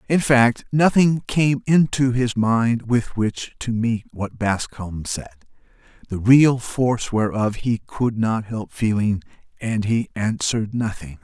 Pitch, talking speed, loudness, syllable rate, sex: 115 Hz, 135 wpm, -20 LUFS, 3.9 syllables/s, male